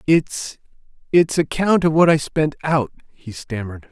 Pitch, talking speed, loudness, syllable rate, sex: 145 Hz, 125 wpm, -19 LUFS, 4.4 syllables/s, male